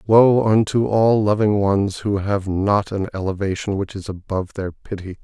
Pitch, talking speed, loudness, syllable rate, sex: 100 Hz, 170 wpm, -19 LUFS, 4.6 syllables/s, male